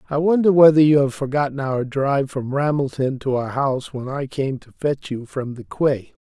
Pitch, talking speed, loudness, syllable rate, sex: 140 Hz, 210 wpm, -20 LUFS, 5.3 syllables/s, male